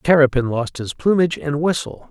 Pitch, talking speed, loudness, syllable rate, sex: 145 Hz, 170 wpm, -19 LUFS, 5.3 syllables/s, male